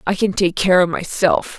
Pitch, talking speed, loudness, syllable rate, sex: 185 Hz, 225 wpm, -17 LUFS, 4.6 syllables/s, female